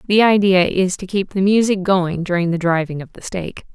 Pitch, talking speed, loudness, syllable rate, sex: 185 Hz, 225 wpm, -17 LUFS, 5.8 syllables/s, female